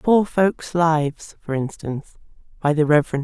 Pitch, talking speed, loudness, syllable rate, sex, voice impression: 160 Hz, 150 wpm, -20 LUFS, 4.2 syllables/s, female, feminine, adult-like, slightly tensed, soft, raspy, intellectual, calm, slightly friendly, reassuring, kind, slightly modest